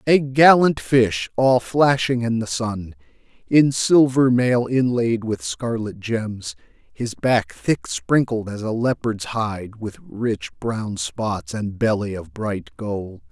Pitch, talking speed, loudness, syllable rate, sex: 110 Hz, 145 wpm, -20 LUFS, 3.3 syllables/s, male